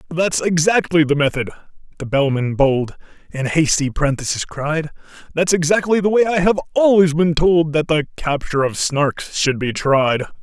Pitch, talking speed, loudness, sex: 155 Hz, 165 wpm, -17 LUFS, male